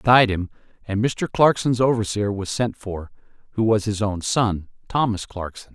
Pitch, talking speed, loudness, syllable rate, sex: 105 Hz, 180 wpm, -22 LUFS, 4.7 syllables/s, male